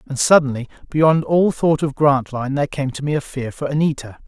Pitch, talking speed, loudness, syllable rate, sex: 140 Hz, 210 wpm, -18 LUFS, 5.7 syllables/s, male